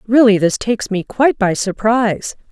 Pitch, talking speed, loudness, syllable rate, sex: 215 Hz, 165 wpm, -15 LUFS, 5.4 syllables/s, female